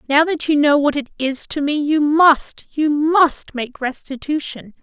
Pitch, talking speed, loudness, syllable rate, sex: 290 Hz, 175 wpm, -17 LUFS, 4.0 syllables/s, female